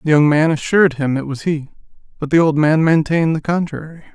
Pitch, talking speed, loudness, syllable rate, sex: 155 Hz, 215 wpm, -16 LUFS, 6.0 syllables/s, male